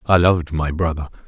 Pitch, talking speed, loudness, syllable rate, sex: 80 Hz, 190 wpm, -19 LUFS, 5.9 syllables/s, male